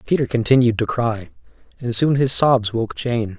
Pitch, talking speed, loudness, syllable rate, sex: 115 Hz, 175 wpm, -18 LUFS, 4.7 syllables/s, male